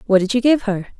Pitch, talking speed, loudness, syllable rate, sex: 220 Hz, 300 wpm, -17 LUFS, 6.7 syllables/s, female